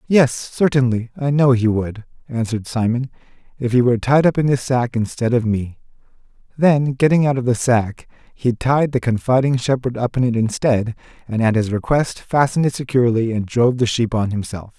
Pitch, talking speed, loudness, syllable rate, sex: 120 Hz, 190 wpm, -18 LUFS, 5.4 syllables/s, male